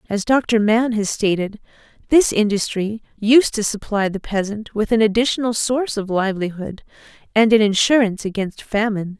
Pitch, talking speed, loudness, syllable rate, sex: 215 Hz, 150 wpm, -18 LUFS, 5.2 syllables/s, female